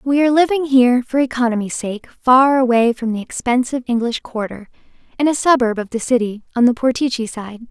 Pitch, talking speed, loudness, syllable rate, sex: 245 Hz, 185 wpm, -17 LUFS, 5.4 syllables/s, female